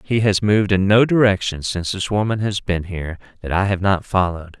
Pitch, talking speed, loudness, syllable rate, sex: 95 Hz, 220 wpm, -19 LUFS, 5.9 syllables/s, male